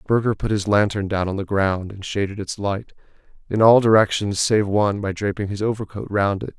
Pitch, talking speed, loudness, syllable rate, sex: 100 Hz, 210 wpm, -20 LUFS, 5.4 syllables/s, male